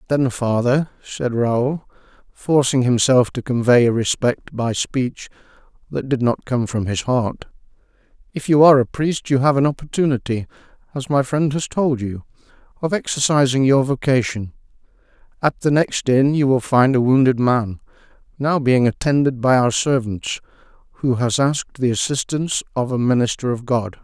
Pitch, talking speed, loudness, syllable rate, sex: 130 Hz, 160 wpm, -18 LUFS, 4.8 syllables/s, male